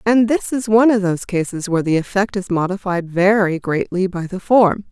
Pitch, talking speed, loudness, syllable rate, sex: 195 Hz, 210 wpm, -17 LUFS, 5.5 syllables/s, female